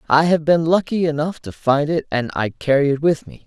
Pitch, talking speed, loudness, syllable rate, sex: 150 Hz, 240 wpm, -19 LUFS, 5.4 syllables/s, male